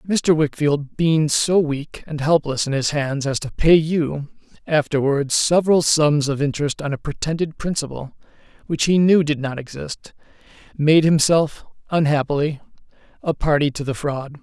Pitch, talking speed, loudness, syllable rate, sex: 150 Hz, 155 wpm, -19 LUFS, 4.6 syllables/s, male